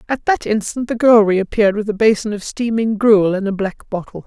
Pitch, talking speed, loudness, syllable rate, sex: 215 Hz, 225 wpm, -16 LUFS, 5.4 syllables/s, female